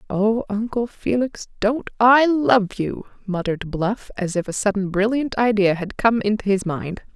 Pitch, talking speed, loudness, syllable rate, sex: 210 Hz, 170 wpm, -20 LUFS, 4.4 syllables/s, female